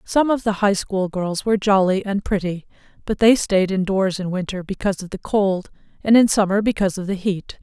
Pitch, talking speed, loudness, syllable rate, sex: 195 Hz, 205 wpm, -20 LUFS, 5.4 syllables/s, female